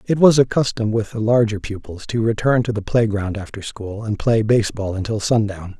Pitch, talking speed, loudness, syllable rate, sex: 110 Hz, 205 wpm, -19 LUFS, 5.3 syllables/s, male